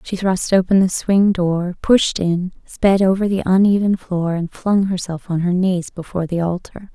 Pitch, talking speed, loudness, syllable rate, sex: 185 Hz, 190 wpm, -18 LUFS, 4.5 syllables/s, female